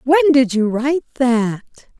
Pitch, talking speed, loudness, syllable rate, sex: 255 Hz, 150 wpm, -16 LUFS, 4.9 syllables/s, female